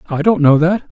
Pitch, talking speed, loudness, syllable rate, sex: 165 Hz, 245 wpm, -13 LUFS, 4.9 syllables/s, male